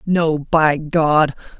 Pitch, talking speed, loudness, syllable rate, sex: 155 Hz, 115 wpm, -17 LUFS, 2.4 syllables/s, female